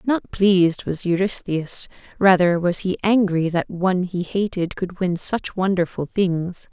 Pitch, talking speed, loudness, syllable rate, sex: 185 Hz, 150 wpm, -21 LUFS, 4.2 syllables/s, female